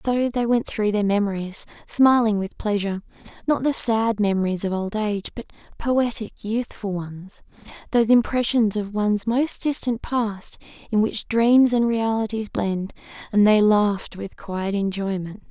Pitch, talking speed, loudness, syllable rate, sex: 215 Hz, 145 wpm, -22 LUFS, 4.5 syllables/s, female